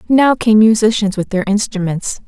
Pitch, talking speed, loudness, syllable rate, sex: 210 Hz, 160 wpm, -14 LUFS, 4.8 syllables/s, female